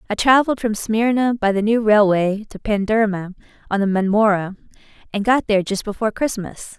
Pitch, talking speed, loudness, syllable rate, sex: 210 Hz, 170 wpm, -18 LUFS, 5.6 syllables/s, female